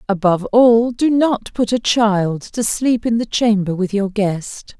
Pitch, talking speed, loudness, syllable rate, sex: 215 Hz, 190 wpm, -16 LUFS, 3.9 syllables/s, female